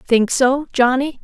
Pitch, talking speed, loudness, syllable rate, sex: 260 Hz, 145 wpm, -16 LUFS, 3.5 syllables/s, female